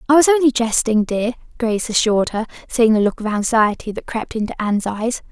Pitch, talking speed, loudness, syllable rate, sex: 230 Hz, 205 wpm, -18 LUFS, 5.9 syllables/s, female